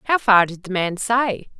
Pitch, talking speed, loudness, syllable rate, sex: 210 Hz, 225 wpm, -19 LUFS, 4.4 syllables/s, female